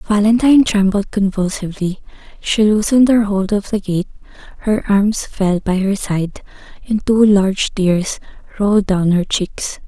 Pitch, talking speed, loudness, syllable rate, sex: 200 Hz, 145 wpm, -16 LUFS, 4.5 syllables/s, female